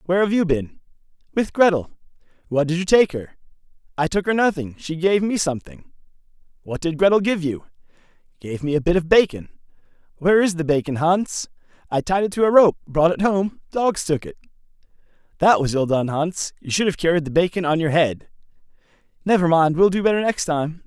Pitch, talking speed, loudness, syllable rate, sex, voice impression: 170 Hz, 195 wpm, -20 LUFS, 5.6 syllables/s, male, masculine, adult-like, tensed, powerful, bright, clear, fluent, cool, intellectual, friendly, wild, lively, intense